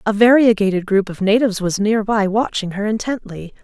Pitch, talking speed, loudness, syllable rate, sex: 210 Hz, 180 wpm, -17 LUFS, 5.5 syllables/s, female